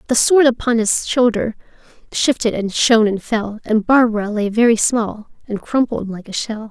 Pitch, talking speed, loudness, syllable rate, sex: 225 Hz, 180 wpm, -17 LUFS, 4.9 syllables/s, female